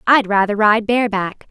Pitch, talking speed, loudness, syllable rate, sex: 215 Hz, 160 wpm, -16 LUFS, 5.2 syllables/s, female